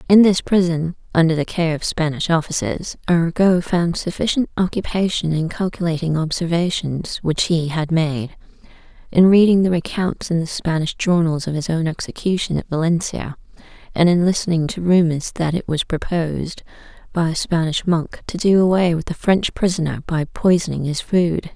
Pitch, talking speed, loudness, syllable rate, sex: 170 Hz, 160 wpm, -19 LUFS, 5.0 syllables/s, female